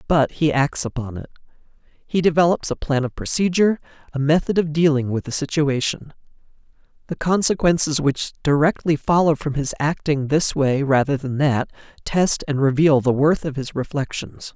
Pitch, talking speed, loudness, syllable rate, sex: 145 Hz, 160 wpm, -20 LUFS, 5.0 syllables/s, male